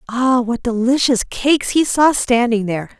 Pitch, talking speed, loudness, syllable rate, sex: 245 Hz, 160 wpm, -16 LUFS, 4.9 syllables/s, female